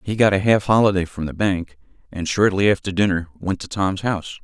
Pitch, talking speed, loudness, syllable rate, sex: 95 Hz, 215 wpm, -20 LUFS, 5.6 syllables/s, male